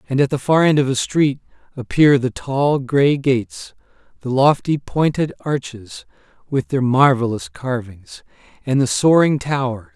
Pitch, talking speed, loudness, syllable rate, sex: 135 Hz, 150 wpm, -18 LUFS, 4.4 syllables/s, male